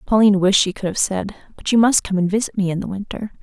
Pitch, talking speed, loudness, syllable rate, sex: 200 Hz, 280 wpm, -18 LUFS, 6.6 syllables/s, female